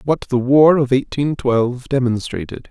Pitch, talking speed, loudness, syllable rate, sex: 130 Hz, 155 wpm, -17 LUFS, 4.7 syllables/s, male